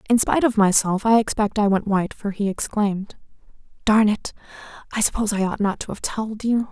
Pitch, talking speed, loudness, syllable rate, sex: 210 Hz, 205 wpm, -21 LUFS, 5.9 syllables/s, female